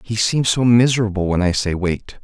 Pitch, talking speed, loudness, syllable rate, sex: 105 Hz, 215 wpm, -17 LUFS, 5.2 syllables/s, male